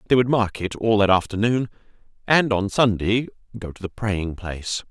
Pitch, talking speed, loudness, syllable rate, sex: 105 Hz, 170 wpm, -21 LUFS, 5.0 syllables/s, male